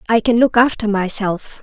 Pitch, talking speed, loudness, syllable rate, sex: 220 Hz, 185 wpm, -16 LUFS, 4.8 syllables/s, female